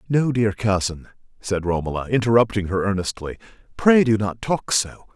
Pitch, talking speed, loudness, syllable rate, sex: 105 Hz, 150 wpm, -21 LUFS, 5.0 syllables/s, male